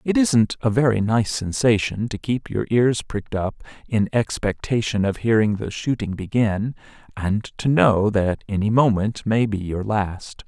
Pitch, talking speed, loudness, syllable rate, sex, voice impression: 110 Hz, 165 wpm, -21 LUFS, 4.3 syllables/s, male, masculine, adult-like, refreshing, slightly sincere, slightly friendly